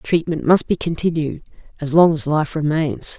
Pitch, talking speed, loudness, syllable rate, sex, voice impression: 155 Hz, 170 wpm, -18 LUFS, 4.7 syllables/s, female, feminine, very adult-like, slightly calm, elegant